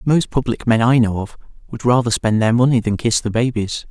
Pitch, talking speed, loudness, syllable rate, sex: 115 Hz, 230 wpm, -17 LUFS, 5.5 syllables/s, male